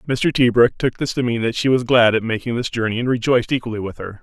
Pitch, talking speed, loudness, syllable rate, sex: 120 Hz, 270 wpm, -18 LUFS, 6.4 syllables/s, male